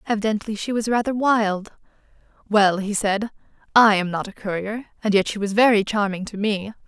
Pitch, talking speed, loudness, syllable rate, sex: 210 Hz, 185 wpm, -21 LUFS, 5.3 syllables/s, female